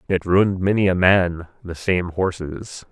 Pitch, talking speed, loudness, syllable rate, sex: 90 Hz, 165 wpm, -19 LUFS, 4.3 syllables/s, male